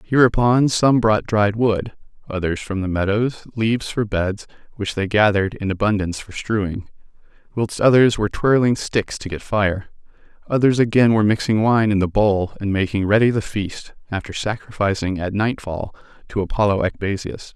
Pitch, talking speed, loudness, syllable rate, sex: 105 Hz, 160 wpm, -19 LUFS, 5.1 syllables/s, male